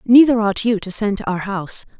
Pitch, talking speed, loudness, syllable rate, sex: 210 Hz, 240 wpm, -17 LUFS, 5.6 syllables/s, female